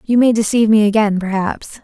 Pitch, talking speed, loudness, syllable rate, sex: 215 Hz, 195 wpm, -15 LUFS, 5.8 syllables/s, female